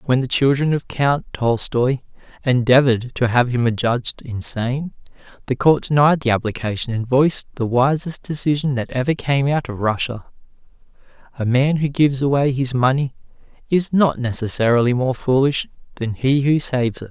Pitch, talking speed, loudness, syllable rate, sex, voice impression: 130 Hz, 160 wpm, -19 LUFS, 5.3 syllables/s, male, masculine, very adult-like, slightly soft, slightly muffled, slightly refreshing, slightly unique, kind